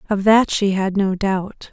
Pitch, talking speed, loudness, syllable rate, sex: 200 Hz, 210 wpm, -18 LUFS, 4.0 syllables/s, female